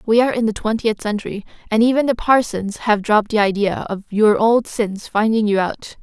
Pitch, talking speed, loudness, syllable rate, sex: 215 Hz, 210 wpm, -18 LUFS, 5.4 syllables/s, female